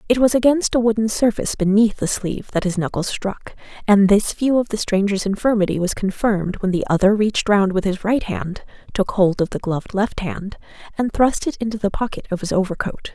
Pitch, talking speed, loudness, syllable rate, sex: 205 Hz, 215 wpm, -19 LUFS, 5.7 syllables/s, female